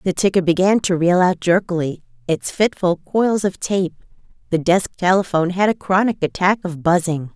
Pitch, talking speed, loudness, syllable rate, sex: 180 Hz, 170 wpm, -18 LUFS, 5.1 syllables/s, female